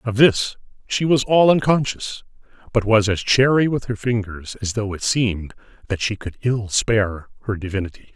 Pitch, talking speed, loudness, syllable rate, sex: 110 Hz, 175 wpm, -20 LUFS, 4.9 syllables/s, male